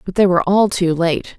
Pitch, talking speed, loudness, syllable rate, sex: 185 Hz, 260 wpm, -16 LUFS, 5.4 syllables/s, female